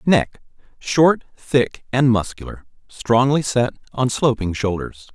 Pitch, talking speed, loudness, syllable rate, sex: 125 Hz, 105 wpm, -19 LUFS, 3.8 syllables/s, male